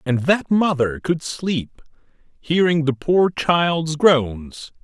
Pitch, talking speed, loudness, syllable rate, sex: 155 Hz, 125 wpm, -19 LUFS, 3.1 syllables/s, male